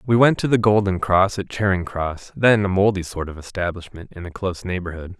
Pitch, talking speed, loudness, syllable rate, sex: 95 Hz, 220 wpm, -20 LUFS, 5.6 syllables/s, male